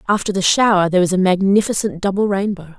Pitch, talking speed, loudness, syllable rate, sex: 195 Hz, 195 wpm, -16 LUFS, 6.6 syllables/s, female